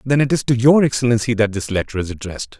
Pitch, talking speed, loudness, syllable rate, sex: 120 Hz, 255 wpm, -17 LUFS, 6.8 syllables/s, male